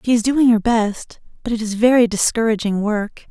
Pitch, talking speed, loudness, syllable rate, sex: 225 Hz, 200 wpm, -17 LUFS, 5.0 syllables/s, female